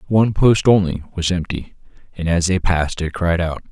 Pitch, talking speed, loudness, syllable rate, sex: 90 Hz, 195 wpm, -18 LUFS, 5.4 syllables/s, male